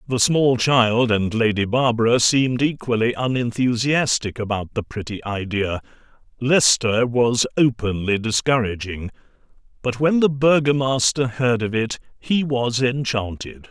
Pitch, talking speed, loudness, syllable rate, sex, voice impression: 120 Hz, 120 wpm, -20 LUFS, 4.3 syllables/s, male, masculine, adult-like, slightly powerful, fluent, slightly intellectual, slightly lively, slightly intense